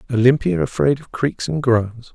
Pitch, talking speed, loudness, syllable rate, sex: 125 Hz, 170 wpm, -19 LUFS, 4.6 syllables/s, male